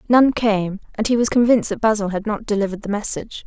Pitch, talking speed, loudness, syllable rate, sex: 215 Hz, 225 wpm, -19 LUFS, 6.6 syllables/s, female